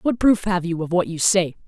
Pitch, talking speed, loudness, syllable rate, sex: 185 Hz, 285 wpm, -20 LUFS, 5.2 syllables/s, female